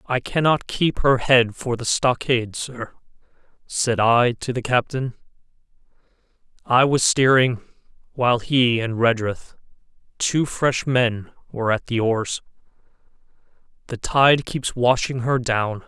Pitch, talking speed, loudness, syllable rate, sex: 125 Hz, 130 wpm, -20 LUFS, 4.0 syllables/s, male